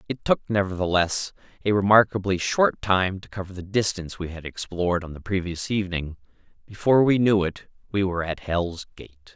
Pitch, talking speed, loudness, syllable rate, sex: 95 Hz, 175 wpm, -24 LUFS, 5.5 syllables/s, male